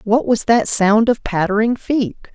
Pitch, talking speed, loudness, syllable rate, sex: 220 Hz, 180 wpm, -16 LUFS, 4.3 syllables/s, female